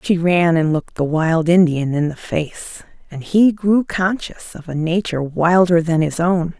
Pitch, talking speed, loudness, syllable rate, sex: 170 Hz, 190 wpm, -17 LUFS, 4.4 syllables/s, female